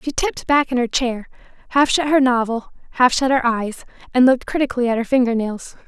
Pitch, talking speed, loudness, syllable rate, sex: 250 Hz, 215 wpm, -18 LUFS, 6.0 syllables/s, female